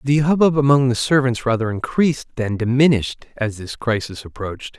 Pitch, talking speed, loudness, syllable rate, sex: 125 Hz, 165 wpm, -19 LUFS, 5.6 syllables/s, male